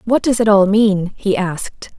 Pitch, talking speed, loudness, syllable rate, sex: 205 Hz, 210 wpm, -15 LUFS, 4.4 syllables/s, female